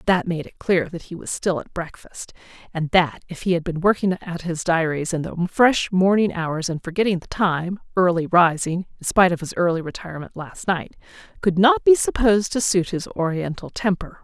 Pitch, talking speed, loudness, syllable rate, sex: 180 Hz, 200 wpm, -21 LUFS, 5.1 syllables/s, female